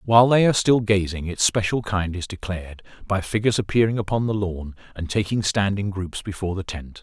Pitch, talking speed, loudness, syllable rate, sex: 100 Hz, 205 wpm, -22 LUFS, 5.9 syllables/s, male